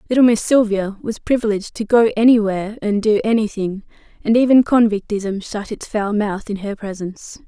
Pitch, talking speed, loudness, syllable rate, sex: 215 Hz, 170 wpm, -18 LUFS, 5.4 syllables/s, female